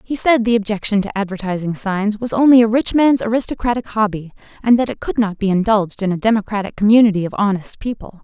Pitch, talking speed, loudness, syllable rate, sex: 215 Hz, 205 wpm, -17 LUFS, 6.3 syllables/s, female